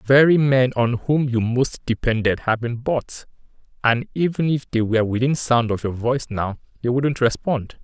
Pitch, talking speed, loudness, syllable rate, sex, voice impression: 125 Hz, 190 wpm, -20 LUFS, 4.7 syllables/s, male, very masculine, very adult-like, very thick, slightly relaxed, weak, slightly bright, soft, clear, slightly fluent, very cool, very intellectual, very sincere, very calm, very mature, friendly, very reassuring, very unique, very elegant, very wild